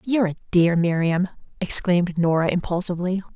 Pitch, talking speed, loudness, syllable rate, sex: 180 Hz, 125 wpm, -21 LUFS, 6.0 syllables/s, female